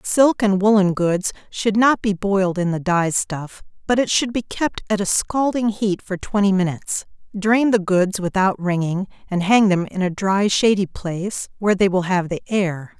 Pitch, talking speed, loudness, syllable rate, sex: 195 Hz, 200 wpm, -19 LUFS, 4.6 syllables/s, female